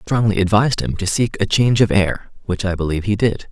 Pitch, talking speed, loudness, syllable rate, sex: 100 Hz, 255 wpm, -18 LUFS, 6.3 syllables/s, male